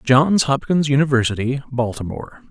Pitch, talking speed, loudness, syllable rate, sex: 135 Hz, 95 wpm, -18 LUFS, 5.4 syllables/s, male